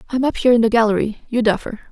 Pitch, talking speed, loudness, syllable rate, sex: 230 Hz, 250 wpm, -17 LUFS, 7.7 syllables/s, female